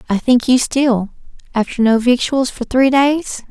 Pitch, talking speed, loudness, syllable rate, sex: 250 Hz, 170 wpm, -15 LUFS, 4.2 syllables/s, female